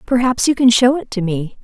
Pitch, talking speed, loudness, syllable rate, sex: 235 Hz, 255 wpm, -15 LUFS, 5.4 syllables/s, female